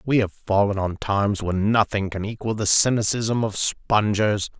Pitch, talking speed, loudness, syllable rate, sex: 105 Hz, 170 wpm, -22 LUFS, 4.5 syllables/s, male